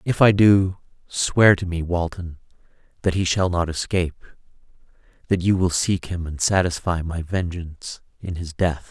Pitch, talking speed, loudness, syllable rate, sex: 90 Hz, 160 wpm, -21 LUFS, 4.6 syllables/s, male